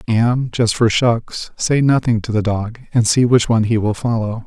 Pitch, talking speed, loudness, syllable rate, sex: 115 Hz, 215 wpm, -16 LUFS, 4.7 syllables/s, male